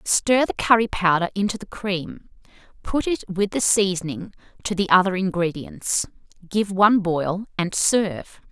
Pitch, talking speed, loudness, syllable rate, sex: 195 Hz, 150 wpm, -21 LUFS, 4.5 syllables/s, female